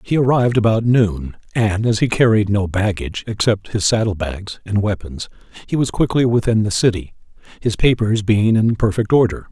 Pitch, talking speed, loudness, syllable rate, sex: 105 Hz, 175 wpm, -17 LUFS, 5.2 syllables/s, male